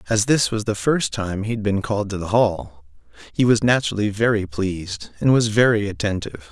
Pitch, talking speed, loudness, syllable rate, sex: 105 Hz, 205 wpm, -20 LUFS, 5.6 syllables/s, male